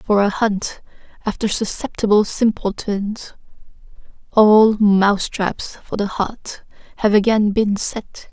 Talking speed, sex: 115 wpm, female